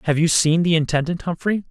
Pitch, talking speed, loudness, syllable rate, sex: 165 Hz, 210 wpm, -19 LUFS, 5.9 syllables/s, male